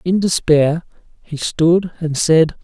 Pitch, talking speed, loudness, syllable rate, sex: 165 Hz, 135 wpm, -16 LUFS, 3.5 syllables/s, male